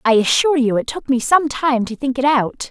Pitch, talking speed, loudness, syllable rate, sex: 260 Hz, 265 wpm, -17 LUFS, 5.4 syllables/s, female